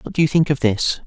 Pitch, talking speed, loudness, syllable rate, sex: 140 Hz, 340 wpm, -18 LUFS, 6.1 syllables/s, male